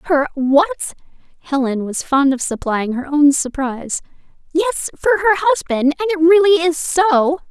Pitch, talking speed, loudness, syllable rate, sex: 310 Hz, 150 wpm, -16 LUFS, 3.5 syllables/s, female